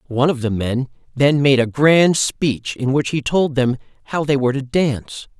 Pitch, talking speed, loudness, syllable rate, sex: 135 Hz, 210 wpm, -18 LUFS, 4.9 syllables/s, male